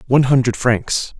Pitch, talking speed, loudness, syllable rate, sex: 125 Hz, 150 wpm, -16 LUFS, 5.2 syllables/s, male